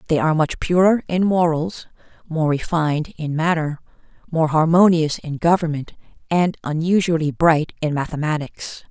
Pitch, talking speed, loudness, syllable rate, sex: 160 Hz, 130 wpm, -19 LUFS, 4.9 syllables/s, female